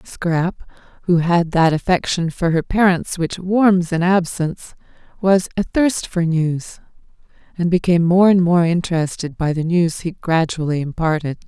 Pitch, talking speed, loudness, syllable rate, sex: 170 Hz, 145 wpm, -18 LUFS, 4.5 syllables/s, female